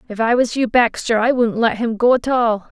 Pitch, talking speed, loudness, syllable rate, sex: 235 Hz, 260 wpm, -17 LUFS, 5.1 syllables/s, female